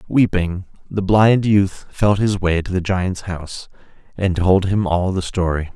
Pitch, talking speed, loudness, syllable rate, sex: 95 Hz, 175 wpm, -18 LUFS, 4.2 syllables/s, male